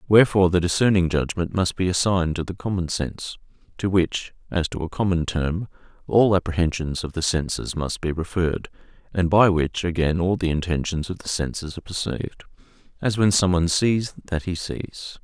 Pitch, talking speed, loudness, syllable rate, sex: 90 Hz, 175 wpm, -23 LUFS, 5.5 syllables/s, male